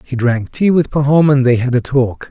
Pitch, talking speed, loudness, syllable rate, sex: 130 Hz, 260 wpm, -14 LUFS, 5.0 syllables/s, male